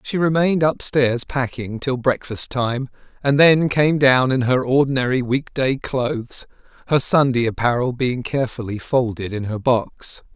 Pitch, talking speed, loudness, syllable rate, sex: 130 Hz, 150 wpm, -19 LUFS, 4.5 syllables/s, male